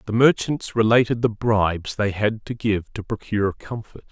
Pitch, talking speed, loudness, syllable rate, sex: 110 Hz, 175 wpm, -21 LUFS, 4.9 syllables/s, male